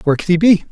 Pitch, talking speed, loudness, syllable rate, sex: 180 Hz, 340 wpm, -13 LUFS, 8.6 syllables/s, male